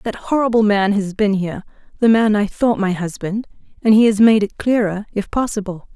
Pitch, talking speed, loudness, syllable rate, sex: 210 Hz, 180 wpm, -17 LUFS, 5.4 syllables/s, female